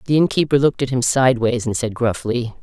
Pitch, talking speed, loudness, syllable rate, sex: 125 Hz, 205 wpm, -18 LUFS, 6.2 syllables/s, female